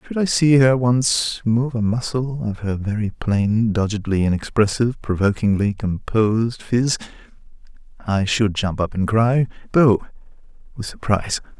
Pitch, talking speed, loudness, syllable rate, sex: 110 Hz, 135 wpm, -19 LUFS, 4.4 syllables/s, male